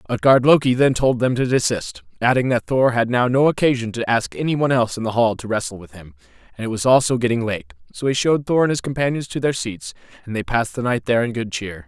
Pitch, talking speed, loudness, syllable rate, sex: 125 Hz, 260 wpm, -19 LUFS, 6.4 syllables/s, male